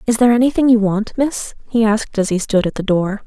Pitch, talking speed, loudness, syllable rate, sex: 220 Hz, 260 wpm, -16 LUFS, 6.1 syllables/s, female